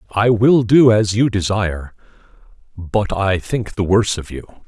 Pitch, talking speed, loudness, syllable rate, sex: 105 Hz, 165 wpm, -16 LUFS, 4.4 syllables/s, male